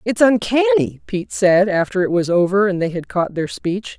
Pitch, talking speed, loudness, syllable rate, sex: 185 Hz, 210 wpm, -17 LUFS, 5.0 syllables/s, female